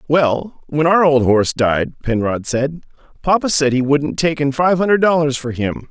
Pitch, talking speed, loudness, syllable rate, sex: 145 Hz, 185 wpm, -16 LUFS, 4.8 syllables/s, male